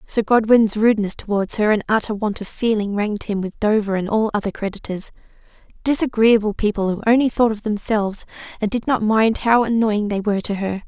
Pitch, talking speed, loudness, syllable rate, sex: 215 Hz, 190 wpm, -19 LUFS, 5.7 syllables/s, female